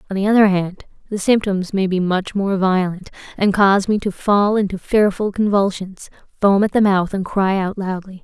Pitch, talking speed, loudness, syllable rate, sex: 195 Hz, 195 wpm, -17 LUFS, 5.0 syllables/s, female